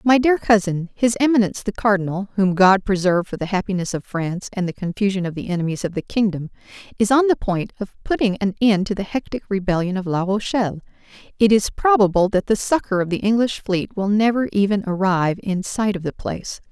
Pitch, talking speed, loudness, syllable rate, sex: 200 Hz, 210 wpm, -20 LUFS, 5.9 syllables/s, female